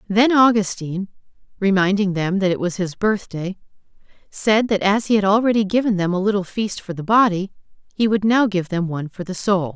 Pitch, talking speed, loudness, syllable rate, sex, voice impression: 200 Hz, 195 wpm, -19 LUFS, 5.5 syllables/s, female, feminine, slightly adult-like, slightly intellectual, slightly calm